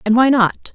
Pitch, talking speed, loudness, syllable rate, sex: 235 Hz, 240 wpm, -15 LUFS, 4.6 syllables/s, female